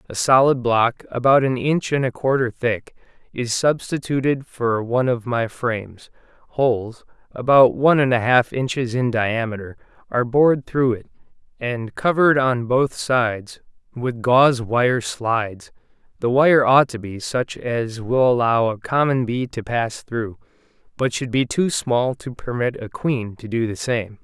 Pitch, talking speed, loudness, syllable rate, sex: 125 Hz, 165 wpm, -20 LUFS, 4.4 syllables/s, male